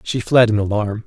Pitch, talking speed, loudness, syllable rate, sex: 110 Hz, 225 wpm, -17 LUFS, 5.2 syllables/s, male